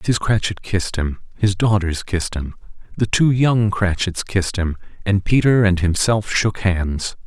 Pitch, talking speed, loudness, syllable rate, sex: 100 Hz, 165 wpm, -19 LUFS, 4.5 syllables/s, male